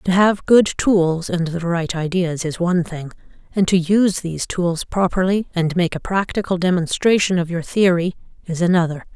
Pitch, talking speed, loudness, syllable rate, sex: 180 Hz, 175 wpm, -19 LUFS, 5.0 syllables/s, female